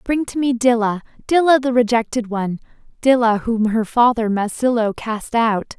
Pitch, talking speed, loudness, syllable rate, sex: 235 Hz, 155 wpm, -18 LUFS, 4.9 syllables/s, female